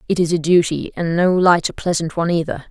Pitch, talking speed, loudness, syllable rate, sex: 170 Hz, 220 wpm, -17 LUFS, 6.0 syllables/s, female